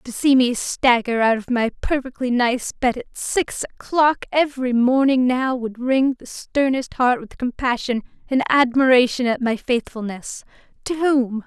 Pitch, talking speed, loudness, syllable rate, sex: 250 Hz, 150 wpm, -20 LUFS, 4.4 syllables/s, female